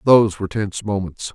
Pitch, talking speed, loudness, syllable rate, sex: 105 Hz, 180 wpm, -20 LUFS, 6.5 syllables/s, male